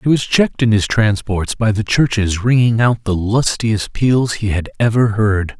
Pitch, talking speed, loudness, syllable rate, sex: 110 Hz, 195 wpm, -15 LUFS, 4.4 syllables/s, male